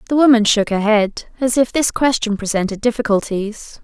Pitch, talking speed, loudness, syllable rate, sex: 225 Hz, 170 wpm, -16 LUFS, 5.1 syllables/s, female